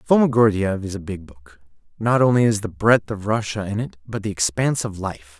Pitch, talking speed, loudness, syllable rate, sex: 105 Hz, 210 wpm, -20 LUFS, 5.4 syllables/s, male